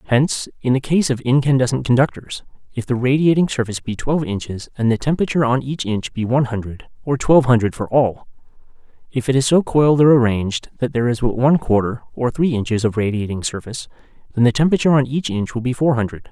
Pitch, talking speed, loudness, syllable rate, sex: 125 Hz, 210 wpm, -18 LUFS, 6.7 syllables/s, male